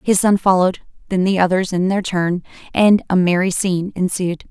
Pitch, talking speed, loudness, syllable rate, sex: 185 Hz, 185 wpm, -17 LUFS, 5.3 syllables/s, female